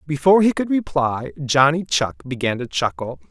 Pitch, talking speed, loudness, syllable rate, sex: 140 Hz, 165 wpm, -19 LUFS, 5.2 syllables/s, male